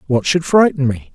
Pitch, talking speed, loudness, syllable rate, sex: 140 Hz, 210 wpm, -15 LUFS, 5.1 syllables/s, male